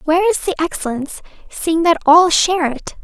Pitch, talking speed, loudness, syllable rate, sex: 330 Hz, 180 wpm, -15 LUFS, 5.7 syllables/s, female